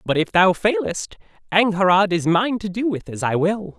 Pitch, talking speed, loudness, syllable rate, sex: 190 Hz, 205 wpm, -19 LUFS, 4.8 syllables/s, male